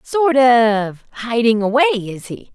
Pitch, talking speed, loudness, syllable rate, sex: 240 Hz, 140 wpm, -15 LUFS, 4.6 syllables/s, female